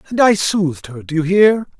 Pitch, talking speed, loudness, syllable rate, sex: 180 Hz, 235 wpm, -15 LUFS, 5.3 syllables/s, male